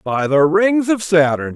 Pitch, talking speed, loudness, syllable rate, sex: 170 Hz, 195 wpm, -15 LUFS, 4.0 syllables/s, male